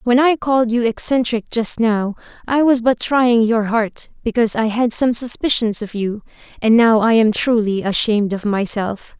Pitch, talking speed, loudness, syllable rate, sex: 230 Hz, 185 wpm, -17 LUFS, 4.8 syllables/s, female